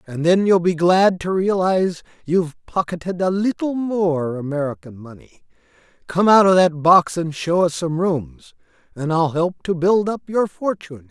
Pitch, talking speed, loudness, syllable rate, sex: 175 Hz, 175 wpm, -19 LUFS, 4.6 syllables/s, male